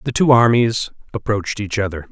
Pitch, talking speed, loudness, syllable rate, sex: 110 Hz, 170 wpm, -17 LUFS, 5.6 syllables/s, male